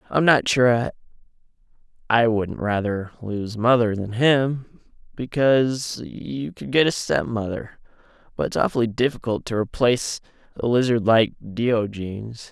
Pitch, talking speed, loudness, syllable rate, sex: 115 Hz, 130 wpm, -22 LUFS, 4.2 syllables/s, male